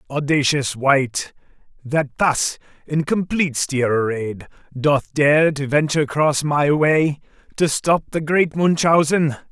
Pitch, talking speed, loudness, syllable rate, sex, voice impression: 145 Hz, 125 wpm, -19 LUFS, 3.8 syllables/s, male, very masculine, very adult-like, slightly old, very thick, tensed, powerful, bright, slightly hard, clear, fluent, slightly raspy, very cool, very intellectual, sincere, very calm, very mature, very friendly, reassuring, unique, very wild, very lively, strict, intense